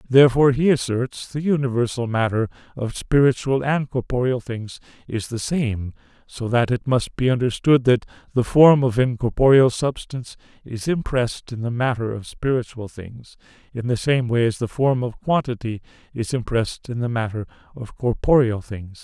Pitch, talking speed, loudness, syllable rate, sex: 125 Hz, 160 wpm, -21 LUFS, 5.0 syllables/s, male